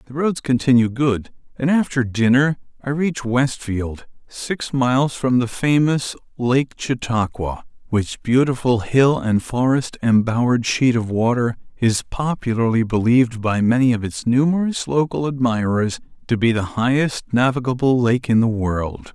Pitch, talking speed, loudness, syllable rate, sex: 125 Hz, 140 wpm, -19 LUFS, 4.4 syllables/s, male